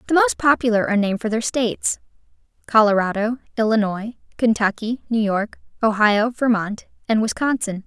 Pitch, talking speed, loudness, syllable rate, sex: 225 Hz, 130 wpm, -20 LUFS, 5.4 syllables/s, female